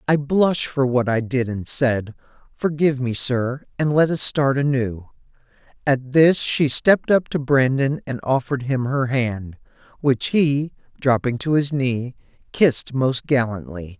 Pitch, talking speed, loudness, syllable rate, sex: 135 Hz, 160 wpm, -20 LUFS, 4.2 syllables/s, male